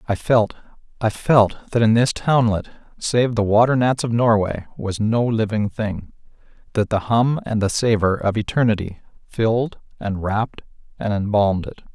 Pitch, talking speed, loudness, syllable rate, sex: 110 Hz, 160 wpm, -20 LUFS, 4.8 syllables/s, male